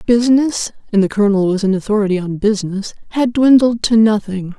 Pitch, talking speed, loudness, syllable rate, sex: 215 Hz, 145 wpm, -15 LUFS, 6.0 syllables/s, female